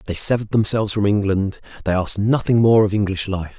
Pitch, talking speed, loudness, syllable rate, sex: 100 Hz, 200 wpm, -18 LUFS, 6.3 syllables/s, male